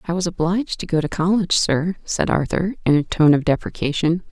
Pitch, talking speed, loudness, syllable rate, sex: 170 Hz, 210 wpm, -20 LUFS, 5.8 syllables/s, female